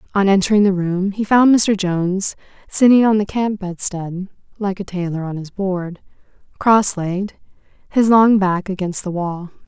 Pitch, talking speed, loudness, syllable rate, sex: 195 Hz, 165 wpm, -17 LUFS, 4.6 syllables/s, female